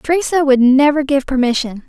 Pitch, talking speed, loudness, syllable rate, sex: 275 Hz, 160 wpm, -14 LUFS, 5.5 syllables/s, female